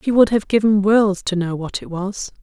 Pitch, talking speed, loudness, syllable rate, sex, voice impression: 200 Hz, 250 wpm, -18 LUFS, 4.9 syllables/s, female, feminine, middle-aged, slightly relaxed, slightly powerful, soft, raspy, friendly, reassuring, elegant, slightly lively, kind